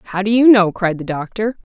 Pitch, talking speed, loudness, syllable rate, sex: 200 Hz, 240 wpm, -15 LUFS, 5.1 syllables/s, female